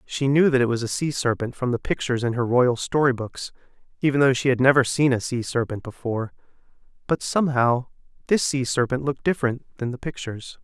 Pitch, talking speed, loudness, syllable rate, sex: 130 Hz, 205 wpm, -23 LUFS, 6.0 syllables/s, male